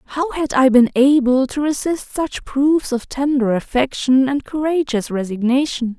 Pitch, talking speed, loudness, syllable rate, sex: 270 Hz, 150 wpm, -17 LUFS, 4.2 syllables/s, female